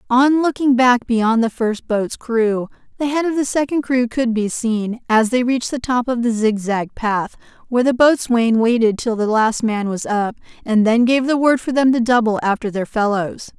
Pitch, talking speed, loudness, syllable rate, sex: 235 Hz, 210 wpm, -17 LUFS, 4.7 syllables/s, female